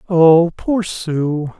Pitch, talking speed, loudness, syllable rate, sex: 170 Hz, 115 wpm, -15 LUFS, 2.1 syllables/s, male